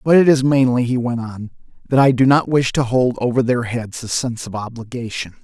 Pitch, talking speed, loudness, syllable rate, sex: 125 Hz, 230 wpm, -17 LUFS, 5.5 syllables/s, male